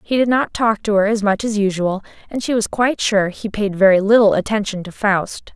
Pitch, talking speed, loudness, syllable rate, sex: 205 Hz, 235 wpm, -17 LUFS, 5.4 syllables/s, female